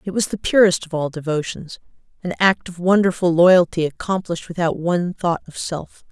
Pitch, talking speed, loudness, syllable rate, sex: 175 Hz, 175 wpm, -19 LUFS, 5.3 syllables/s, female